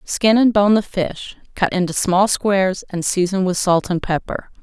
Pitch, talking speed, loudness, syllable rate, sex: 190 Hz, 195 wpm, -18 LUFS, 4.5 syllables/s, female